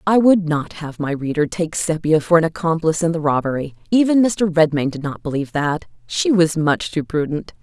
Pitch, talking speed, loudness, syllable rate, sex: 160 Hz, 205 wpm, -18 LUFS, 5.4 syllables/s, female